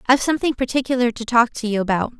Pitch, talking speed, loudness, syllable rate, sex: 240 Hz, 220 wpm, -19 LUFS, 7.1 syllables/s, female